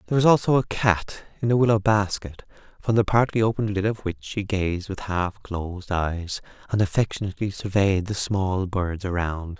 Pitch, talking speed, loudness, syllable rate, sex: 100 Hz, 180 wpm, -24 LUFS, 5.1 syllables/s, male